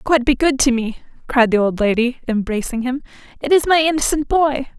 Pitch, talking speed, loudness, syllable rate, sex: 260 Hz, 200 wpm, -17 LUFS, 5.4 syllables/s, female